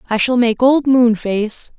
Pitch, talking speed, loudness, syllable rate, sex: 240 Hz, 170 wpm, -14 LUFS, 4.5 syllables/s, female